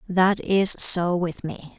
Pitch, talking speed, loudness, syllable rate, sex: 180 Hz, 170 wpm, -21 LUFS, 3.1 syllables/s, female